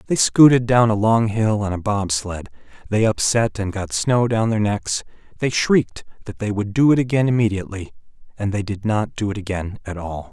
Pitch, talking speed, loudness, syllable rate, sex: 105 Hz, 205 wpm, -19 LUFS, 5.2 syllables/s, male